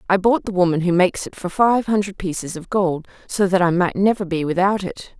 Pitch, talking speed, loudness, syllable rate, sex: 185 Hz, 245 wpm, -19 LUFS, 5.7 syllables/s, female